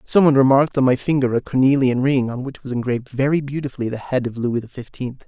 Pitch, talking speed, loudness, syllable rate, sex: 130 Hz, 230 wpm, -19 LUFS, 6.6 syllables/s, male